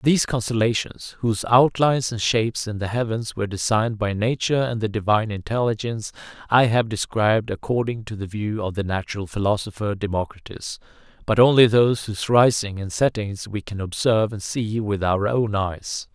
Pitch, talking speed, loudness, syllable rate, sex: 110 Hz, 165 wpm, -22 LUFS, 5.6 syllables/s, male